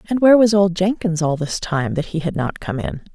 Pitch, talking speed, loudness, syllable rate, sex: 180 Hz, 265 wpm, -18 LUFS, 5.4 syllables/s, female